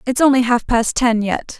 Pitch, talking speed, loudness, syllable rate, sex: 245 Hz, 225 wpm, -16 LUFS, 4.8 syllables/s, female